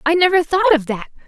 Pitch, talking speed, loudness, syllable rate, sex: 320 Hz, 235 wpm, -16 LUFS, 6.9 syllables/s, female